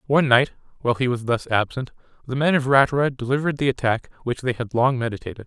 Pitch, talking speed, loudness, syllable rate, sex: 130 Hz, 210 wpm, -21 LUFS, 6.8 syllables/s, male